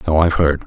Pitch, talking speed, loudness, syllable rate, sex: 80 Hz, 270 wpm, -16 LUFS, 7.3 syllables/s, male